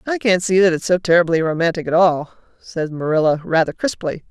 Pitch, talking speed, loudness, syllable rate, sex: 170 Hz, 195 wpm, -17 LUFS, 5.8 syllables/s, female